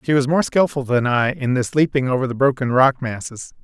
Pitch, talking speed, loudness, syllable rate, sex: 135 Hz, 230 wpm, -18 LUFS, 5.5 syllables/s, male